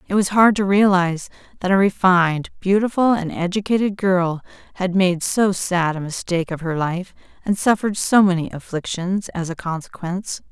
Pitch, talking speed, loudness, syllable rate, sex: 185 Hz, 165 wpm, -19 LUFS, 5.2 syllables/s, female